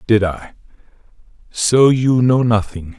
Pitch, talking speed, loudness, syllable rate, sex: 115 Hz, 120 wpm, -15 LUFS, 3.7 syllables/s, male